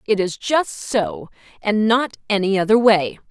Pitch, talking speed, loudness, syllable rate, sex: 215 Hz, 165 wpm, -19 LUFS, 4.1 syllables/s, female